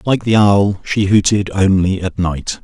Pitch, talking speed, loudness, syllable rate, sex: 100 Hz, 180 wpm, -14 LUFS, 4.1 syllables/s, male